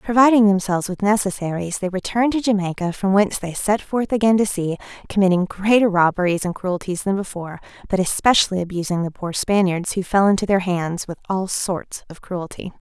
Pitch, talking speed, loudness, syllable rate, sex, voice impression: 190 Hz, 180 wpm, -20 LUFS, 5.8 syllables/s, female, feminine, adult-like, tensed, slightly powerful, bright, soft, fluent, cute, slightly refreshing, calm, friendly, reassuring, elegant, slightly sweet, lively